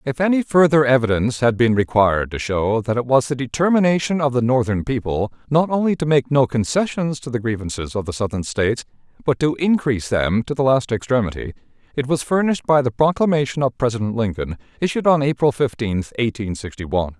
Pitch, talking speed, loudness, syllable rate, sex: 125 Hz, 190 wpm, -19 LUFS, 6.0 syllables/s, male